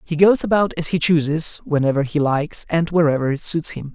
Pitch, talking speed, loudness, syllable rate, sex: 155 Hz, 215 wpm, -19 LUFS, 5.6 syllables/s, male